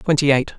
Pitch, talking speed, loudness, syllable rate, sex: 145 Hz, 305 wpm, -17 LUFS, 7.7 syllables/s, male